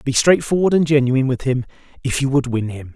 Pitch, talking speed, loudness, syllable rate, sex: 135 Hz, 225 wpm, -18 LUFS, 5.9 syllables/s, male